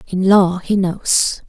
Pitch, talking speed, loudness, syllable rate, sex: 190 Hz, 160 wpm, -15 LUFS, 3.1 syllables/s, female